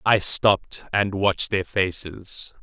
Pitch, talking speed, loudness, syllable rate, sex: 95 Hz, 135 wpm, -22 LUFS, 3.8 syllables/s, male